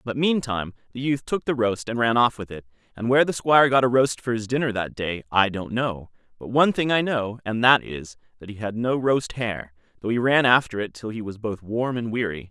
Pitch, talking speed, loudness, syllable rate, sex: 115 Hz, 255 wpm, -23 LUFS, 5.6 syllables/s, male